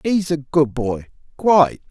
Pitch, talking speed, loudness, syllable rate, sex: 155 Hz, 125 wpm, -18 LUFS, 4.2 syllables/s, male